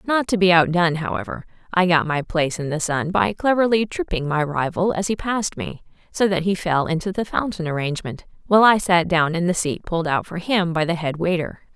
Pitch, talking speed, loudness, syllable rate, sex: 175 Hz, 225 wpm, -20 LUFS, 5.8 syllables/s, female